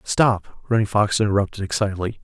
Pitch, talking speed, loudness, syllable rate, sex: 105 Hz, 135 wpm, -21 LUFS, 5.7 syllables/s, male